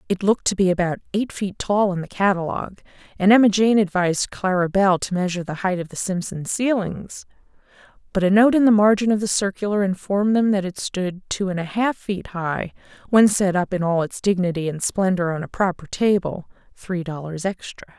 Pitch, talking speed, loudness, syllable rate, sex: 190 Hz, 205 wpm, -21 LUFS, 5.6 syllables/s, female